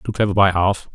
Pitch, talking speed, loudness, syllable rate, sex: 100 Hz, 255 wpm, -17 LUFS, 6.3 syllables/s, male